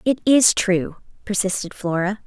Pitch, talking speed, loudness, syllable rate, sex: 200 Hz, 135 wpm, -19 LUFS, 4.4 syllables/s, female